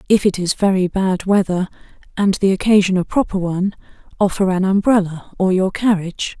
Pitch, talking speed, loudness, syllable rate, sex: 190 Hz, 170 wpm, -17 LUFS, 5.5 syllables/s, female